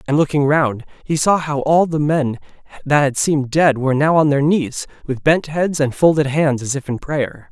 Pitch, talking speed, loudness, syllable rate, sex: 145 Hz, 225 wpm, -17 LUFS, 4.9 syllables/s, male